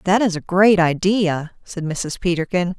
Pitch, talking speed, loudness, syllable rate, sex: 180 Hz, 175 wpm, -19 LUFS, 4.3 syllables/s, female